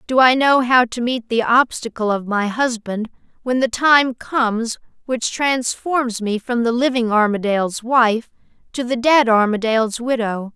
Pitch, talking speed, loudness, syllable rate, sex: 235 Hz, 160 wpm, -18 LUFS, 4.4 syllables/s, female